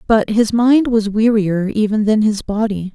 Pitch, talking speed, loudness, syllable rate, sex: 215 Hz, 185 wpm, -15 LUFS, 4.3 syllables/s, female